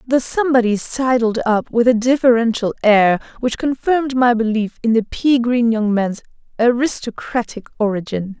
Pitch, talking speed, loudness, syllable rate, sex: 235 Hz, 145 wpm, -17 LUFS, 4.9 syllables/s, female